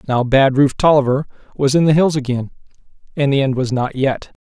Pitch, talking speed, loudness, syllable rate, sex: 135 Hz, 200 wpm, -16 LUFS, 5.9 syllables/s, male